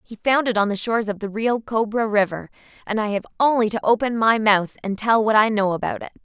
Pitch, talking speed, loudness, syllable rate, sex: 220 Hz, 250 wpm, -20 LUFS, 6.0 syllables/s, female